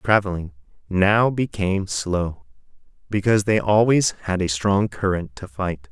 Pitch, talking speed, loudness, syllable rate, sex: 95 Hz, 130 wpm, -21 LUFS, 4.4 syllables/s, male